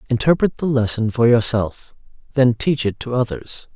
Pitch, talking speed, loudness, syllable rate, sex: 120 Hz, 160 wpm, -18 LUFS, 4.8 syllables/s, male